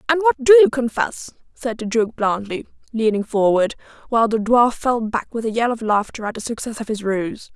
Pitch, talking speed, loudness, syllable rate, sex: 230 Hz, 215 wpm, -19 LUFS, 5.3 syllables/s, female